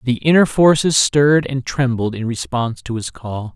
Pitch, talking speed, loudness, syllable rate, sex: 130 Hz, 185 wpm, -17 LUFS, 5.0 syllables/s, male